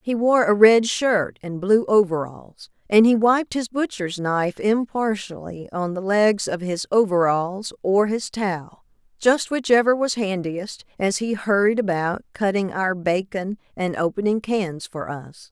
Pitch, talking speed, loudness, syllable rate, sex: 200 Hz, 150 wpm, -21 LUFS, 4.2 syllables/s, female